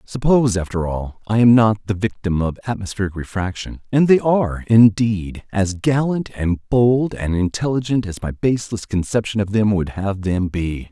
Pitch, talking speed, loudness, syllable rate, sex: 105 Hz, 170 wpm, -19 LUFS, 4.8 syllables/s, male